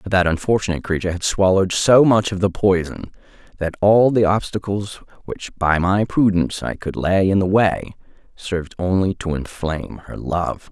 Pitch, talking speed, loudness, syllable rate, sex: 95 Hz, 175 wpm, -18 LUFS, 5.1 syllables/s, male